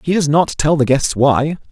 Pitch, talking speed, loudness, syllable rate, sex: 150 Hz, 245 wpm, -15 LUFS, 4.7 syllables/s, male